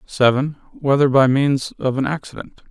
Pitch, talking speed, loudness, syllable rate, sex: 135 Hz, 155 wpm, -18 LUFS, 5.5 syllables/s, male